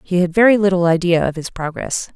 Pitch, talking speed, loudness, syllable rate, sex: 180 Hz, 225 wpm, -16 LUFS, 5.9 syllables/s, female